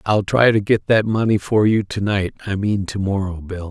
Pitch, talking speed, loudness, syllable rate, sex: 100 Hz, 225 wpm, -18 LUFS, 4.9 syllables/s, male